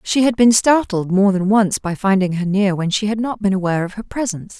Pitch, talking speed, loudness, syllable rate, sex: 200 Hz, 260 wpm, -17 LUFS, 5.8 syllables/s, female